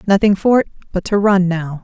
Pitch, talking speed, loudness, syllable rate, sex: 190 Hz, 230 wpm, -15 LUFS, 5.6 syllables/s, female